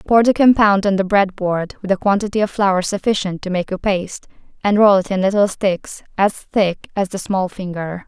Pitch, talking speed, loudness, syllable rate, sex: 195 Hz, 215 wpm, -17 LUFS, 5.1 syllables/s, female